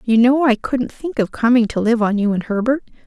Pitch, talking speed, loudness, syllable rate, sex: 235 Hz, 255 wpm, -17 LUFS, 5.3 syllables/s, female